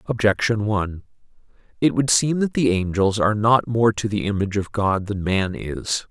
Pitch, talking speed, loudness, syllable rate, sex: 105 Hz, 185 wpm, -21 LUFS, 5.0 syllables/s, male